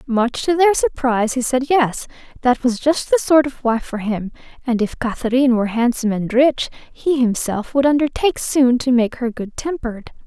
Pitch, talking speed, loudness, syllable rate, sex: 255 Hz, 195 wpm, -18 LUFS, 5.2 syllables/s, female